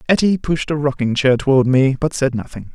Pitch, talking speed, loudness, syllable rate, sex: 135 Hz, 220 wpm, -17 LUFS, 5.5 syllables/s, male